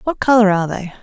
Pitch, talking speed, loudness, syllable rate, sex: 210 Hz, 235 wpm, -15 LUFS, 7.1 syllables/s, female